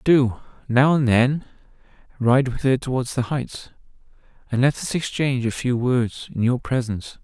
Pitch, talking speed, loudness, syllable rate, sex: 125 Hz, 165 wpm, -21 LUFS, 4.8 syllables/s, male